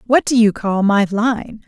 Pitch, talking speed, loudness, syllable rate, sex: 220 Hz, 215 wpm, -16 LUFS, 4.1 syllables/s, female